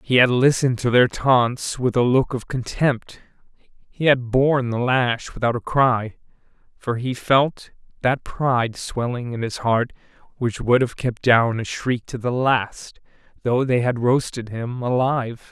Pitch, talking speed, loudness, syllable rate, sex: 125 Hz, 170 wpm, -21 LUFS, 4.2 syllables/s, male